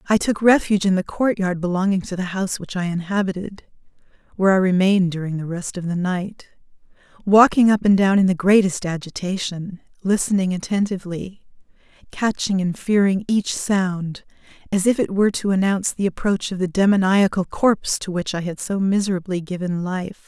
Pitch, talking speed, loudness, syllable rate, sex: 190 Hz, 170 wpm, -20 LUFS, 5.5 syllables/s, female